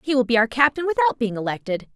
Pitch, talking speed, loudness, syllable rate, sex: 260 Hz, 245 wpm, -21 LUFS, 8.4 syllables/s, female